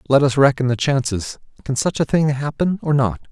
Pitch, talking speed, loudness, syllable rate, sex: 135 Hz, 200 wpm, -19 LUFS, 5.4 syllables/s, male